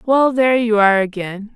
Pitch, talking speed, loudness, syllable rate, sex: 225 Hz, 195 wpm, -15 LUFS, 5.5 syllables/s, female